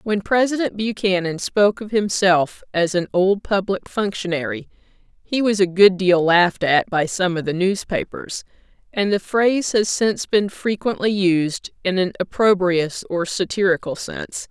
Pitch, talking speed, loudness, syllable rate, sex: 195 Hz, 155 wpm, -19 LUFS, 4.6 syllables/s, female